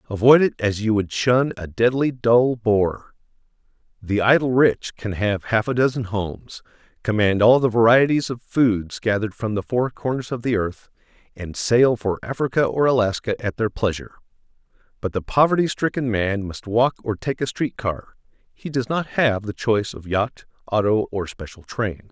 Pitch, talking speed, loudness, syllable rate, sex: 115 Hz, 175 wpm, -21 LUFS, 4.8 syllables/s, male